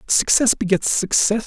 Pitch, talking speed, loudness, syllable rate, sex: 210 Hz, 125 wpm, -17 LUFS, 4.5 syllables/s, male